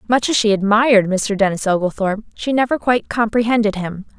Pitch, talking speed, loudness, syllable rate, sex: 215 Hz, 170 wpm, -17 LUFS, 6.0 syllables/s, female